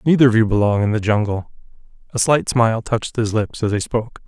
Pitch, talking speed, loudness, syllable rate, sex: 110 Hz, 225 wpm, -18 LUFS, 6.3 syllables/s, male